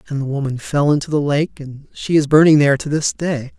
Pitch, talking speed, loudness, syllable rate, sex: 145 Hz, 250 wpm, -16 LUFS, 5.8 syllables/s, male